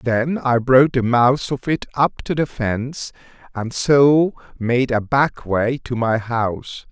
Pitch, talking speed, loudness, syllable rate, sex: 125 Hz, 175 wpm, -18 LUFS, 3.7 syllables/s, male